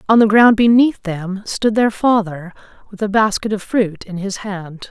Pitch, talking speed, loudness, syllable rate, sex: 205 Hz, 195 wpm, -16 LUFS, 4.4 syllables/s, female